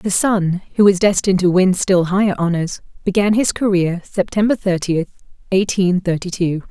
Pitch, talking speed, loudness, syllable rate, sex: 190 Hz, 160 wpm, -17 LUFS, 5.1 syllables/s, female